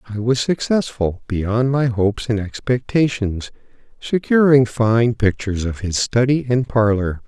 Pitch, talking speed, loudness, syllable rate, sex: 115 Hz, 130 wpm, -18 LUFS, 4.3 syllables/s, male